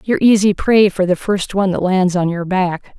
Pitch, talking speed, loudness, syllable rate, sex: 190 Hz, 240 wpm, -15 LUFS, 5.5 syllables/s, female